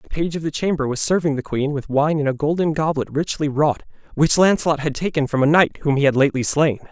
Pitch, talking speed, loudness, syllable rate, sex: 150 Hz, 250 wpm, -19 LUFS, 6.1 syllables/s, male